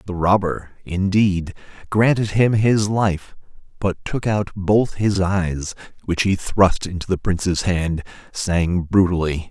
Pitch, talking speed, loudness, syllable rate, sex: 95 Hz, 140 wpm, -20 LUFS, 3.7 syllables/s, male